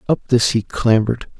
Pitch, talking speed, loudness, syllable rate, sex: 115 Hz, 170 wpm, -17 LUFS, 5.7 syllables/s, male